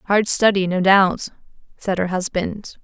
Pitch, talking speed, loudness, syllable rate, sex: 195 Hz, 150 wpm, -18 LUFS, 4.0 syllables/s, female